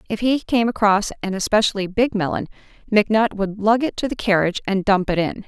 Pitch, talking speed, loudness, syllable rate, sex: 210 Hz, 210 wpm, -20 LUFS, 6.0 syllables/s, female